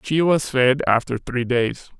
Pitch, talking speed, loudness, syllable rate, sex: 130 Hz, 180 wpm, -20 LUFS, 3.9 syllables/s, female